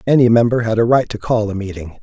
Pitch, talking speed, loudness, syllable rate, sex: 110 Hz, 265 wpm, -15 LUFS, 6.4 syllables/s, male